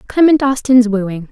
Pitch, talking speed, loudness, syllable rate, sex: 240 Hz, 135 wpm, -13 LUFS, 4.4 syllables/s, female